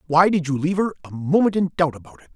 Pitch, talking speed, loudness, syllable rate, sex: 160 Hz, 280 wpm, -20 LUFS, 6.8 syllables/s, male